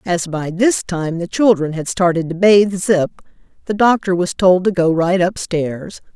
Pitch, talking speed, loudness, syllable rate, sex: 180 Hz, 185 wpm, -16 LUFS, 4.3 syllables/s, female